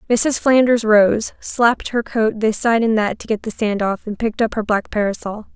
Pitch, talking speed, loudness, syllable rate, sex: 220 Hz, 225 wpm, -18 LUFS, 5.0 syllables/s, female